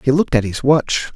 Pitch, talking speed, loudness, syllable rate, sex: 135 Hz, 260 wpm, -17 LUFS, 6.3 syllables/s, male